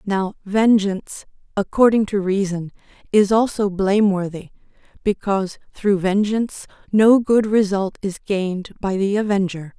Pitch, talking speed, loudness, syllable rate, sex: 200 Hz, 115 wpm, -19 LUFS, 4.6 syllables/s, female